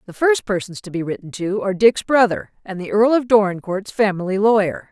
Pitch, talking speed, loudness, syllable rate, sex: 200 Hz, 205 wpm, -18 LUFS, 5.6 syllables/s, female